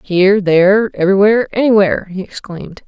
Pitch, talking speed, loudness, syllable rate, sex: 195 Hz, 125 wpm, -12 LUFS, 6.2 syllables/s, female